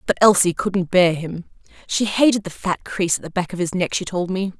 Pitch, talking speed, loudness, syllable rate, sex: 185 Hz, 250 wpm, -20 LUFS, 5.5 syllables/s, female